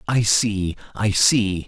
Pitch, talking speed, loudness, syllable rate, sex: 105 Hz, 145 wpm, -19 LUFS, 3.0 syllables/s, male